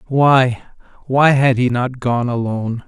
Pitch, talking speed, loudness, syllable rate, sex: 125 Hz, 145 wpm, -16 LUFS, 4.0 syllables/s, male